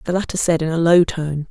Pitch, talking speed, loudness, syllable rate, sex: 165 Hz, 280 wpm, -18 LUFS, 5.9 syllables/s, female